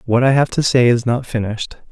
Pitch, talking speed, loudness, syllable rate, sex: 120 Hz, 250 wpm, -16 LUFS, 6.0 syllables/s, male